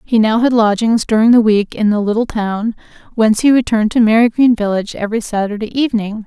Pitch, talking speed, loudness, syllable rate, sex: 220 Hz, 190 wpm, -14 LUFS, 6.2 syllables/s, female